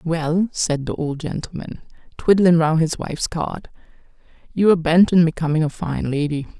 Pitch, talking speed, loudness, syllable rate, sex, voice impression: 165 Hz, 165 wpm, -19 LUFS, 5.0 syllables/s, female, gender-neutral, adult-like, tensed, powerful, bright, clear, intellectual, calm, slightly friendly, reassuring, lively, slightly kind